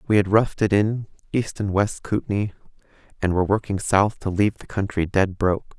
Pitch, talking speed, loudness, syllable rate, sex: 100 Hz, 195 wpm, -22 LUFS, 5.8 syllables/s, male